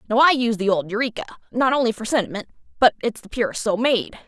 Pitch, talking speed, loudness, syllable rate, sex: 225 Hz, 210 wpm, -21 LUFS, 7.0 syllables/s, female